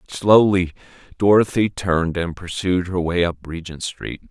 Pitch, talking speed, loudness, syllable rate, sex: 90 Hz, 140 wpm, -19 LUFS, 4.5 syllables/s, male